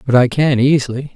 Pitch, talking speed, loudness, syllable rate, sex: 130 Hz, 210 wpm, -14 LUFS, 5.8 syllables/s, male